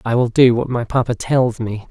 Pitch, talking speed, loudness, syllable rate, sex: 120 Hz, 250 wpm, -17 LUFS, 5.0 syllables/s, male